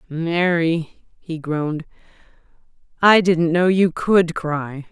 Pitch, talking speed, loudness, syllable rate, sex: 170 Hz, 110 wpm, -18 LUFS, 3.2 syllables/s, female